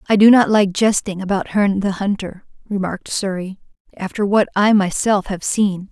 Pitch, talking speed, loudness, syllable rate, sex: 200 Hz, 175 wpm, -17 LUFS, 5.1 syllables/s, female